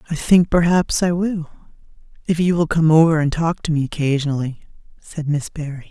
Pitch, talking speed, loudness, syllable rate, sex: 160 Hz, 185 wpm, -18 LUFS, 5.5 syllables/s, female